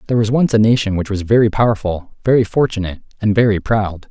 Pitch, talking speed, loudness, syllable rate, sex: 105 Hz, 205 wpm, -16 LUFS, 6.7 syllables/s, male